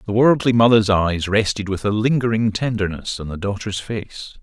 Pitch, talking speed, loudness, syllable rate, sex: 105 Hz, 175 wpm, -19 LUFS, 5.0 syllables/s, male